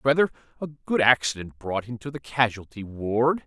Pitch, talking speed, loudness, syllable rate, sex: 125 Hz, 155 wpm, -24 LUFS, 4.9 syllables/s, male